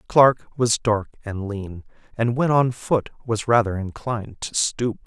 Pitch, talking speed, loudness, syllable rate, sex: 115 Hz, 165 wpm, -22 LUFS, 3.9 syllables/s, male